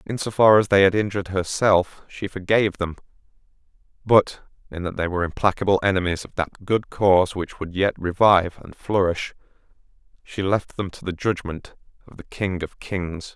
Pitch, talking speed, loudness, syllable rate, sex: 95 Hz, 175 wpm, -22 LUFS, 5.2 syllables/s, male